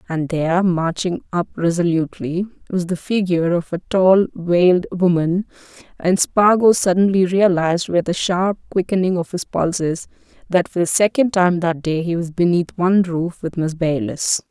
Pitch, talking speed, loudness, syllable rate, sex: 175 Hz, 160 wpm, -18 LUFS, 4.8 syllables/s, female